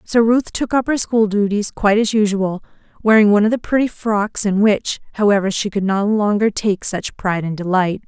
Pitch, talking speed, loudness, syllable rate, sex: 210 Hz, 210 wpm, -17 LUFS, 5.2 syllables/s, female